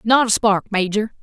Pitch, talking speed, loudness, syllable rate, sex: 215 Hz, 195 wpm, -18 LUFS, 4.7 syllables/s, female